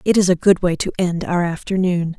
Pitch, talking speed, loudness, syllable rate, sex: 180 Hz, 245 wpm, -18 LUFS, 5.5 syllables/s, female